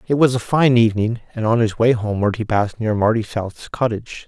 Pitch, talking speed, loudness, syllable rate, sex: 115 Hz, 225 wpm, -18 LUFS, 6.0 syllables/s, male